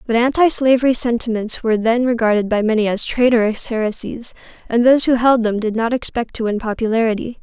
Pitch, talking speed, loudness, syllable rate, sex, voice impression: 230 Hz, 180 wpm, -17 LUFS, 6.0 syllables/s, female, feminine, slightly young, tensed, slightly powerful, slightly bright, clear, fluent, slightly cute, friendly, kind